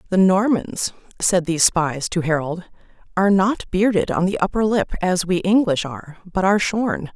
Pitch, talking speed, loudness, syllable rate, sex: 185 Hz, 175 wpm, -19 LUFS, 5.0 syllables/s, female